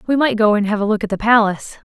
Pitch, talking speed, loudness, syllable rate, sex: 215 Hz, 315 wpm, -16 LUFS, 7.1 syllables/s, female